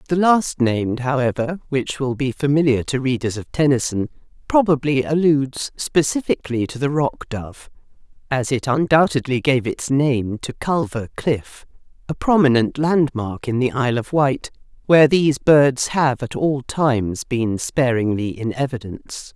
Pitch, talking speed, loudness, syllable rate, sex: 135 Hz, 145 wpm, -19 LUFS, 4.6 syllables/s, female